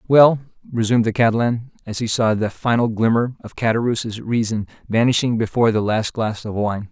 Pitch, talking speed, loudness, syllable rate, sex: 115 Hz, 175 wpm, -19 LUFS, 5.7 syllables/s, male